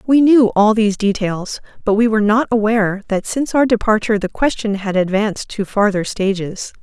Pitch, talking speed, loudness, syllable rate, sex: 215 Hz, 185 wpm, -16 LUFS, 5.6 syllables/s, female